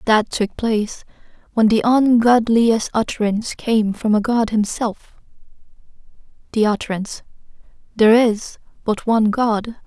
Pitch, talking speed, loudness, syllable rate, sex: 220 Hz, 110 wpm, -18 LUFS, 4.6 syllables/s, female